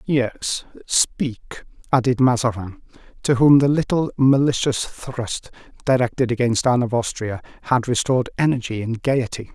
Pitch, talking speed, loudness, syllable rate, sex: 125 Hz, 125 wpm, -20 LUFS, 4.7 syllables/s, male